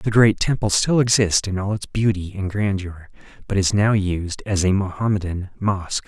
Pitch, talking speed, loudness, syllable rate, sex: 100 Hz, 190 wpm, -20 LUFS, 4.7 syllables/s, male